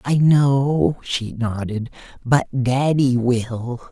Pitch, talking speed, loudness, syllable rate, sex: 125 Hz, 105 wpm, -19 LUFS, 2.7 syllables/s, male